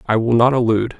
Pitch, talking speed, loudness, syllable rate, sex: 115 Hz, 240 wpm, -16 LUFS, 6.9 syllables/s, male